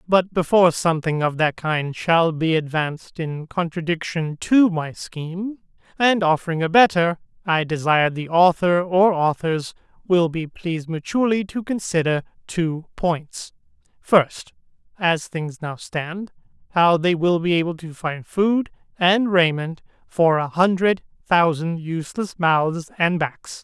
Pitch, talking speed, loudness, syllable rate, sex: 170 Hz, 140 wpm, -21 LUFS, 4.2 syllables/s, male